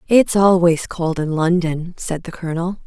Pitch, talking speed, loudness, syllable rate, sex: 170 Hz, 165 wpm, -18 LUFS, 4.6 syllables/s, female